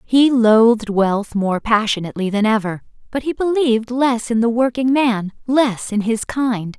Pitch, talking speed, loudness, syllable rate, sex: 230 Hz, 170 wpm, -17 LUFS, 4.4 syllables/s, female